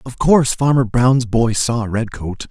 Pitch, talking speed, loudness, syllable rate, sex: 120 Hz, 165 wpm, -16 LUFS, 4.2 syllables/s, male